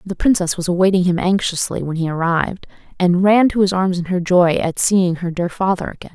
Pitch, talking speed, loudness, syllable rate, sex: 180 Hz, 225 wpm, -17 LUFS, 5.6 syllables/s, female